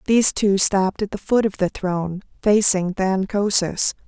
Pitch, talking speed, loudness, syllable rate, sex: 195 Hz, 175 wpm, -20 LUFS, 4.8 syllables/s, female